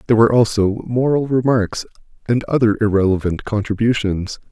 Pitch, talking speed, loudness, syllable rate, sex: 110 Hz, 120 wpm, -17 LUFS, 5.6 syllables/s, male